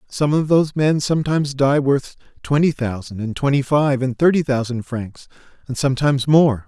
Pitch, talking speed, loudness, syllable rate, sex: 140 Hz, 170 wpm, -18 LUFS, 5.3 syllables/s, male